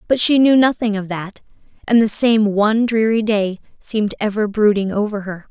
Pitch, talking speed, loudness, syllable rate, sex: 215 Hz, 185 wpm, -17 LUFS, 5.2 syllables/s, female